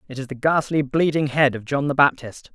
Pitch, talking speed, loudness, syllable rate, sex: 140 Hz, 235 wpm, -20 LUFS, 5.5 syllables/s, male